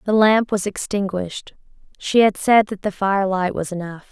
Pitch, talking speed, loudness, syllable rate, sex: 200 Hz, 175 wpm, -19 LUFS, 5.1 syllables/s, female